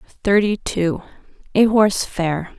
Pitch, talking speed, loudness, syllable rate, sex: 195 Hz, 115 wpm, -18 LUFS, 3.7 syllables/s, female